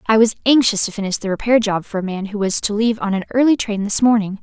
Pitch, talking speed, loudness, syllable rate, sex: 215 Hz, 285 wpm, -17 LUFS, 6.6 syllables/s, female